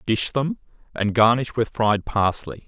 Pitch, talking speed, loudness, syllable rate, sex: 115 Hz, 155 wpm, -21 LUFS, 4.1 syllables/s, male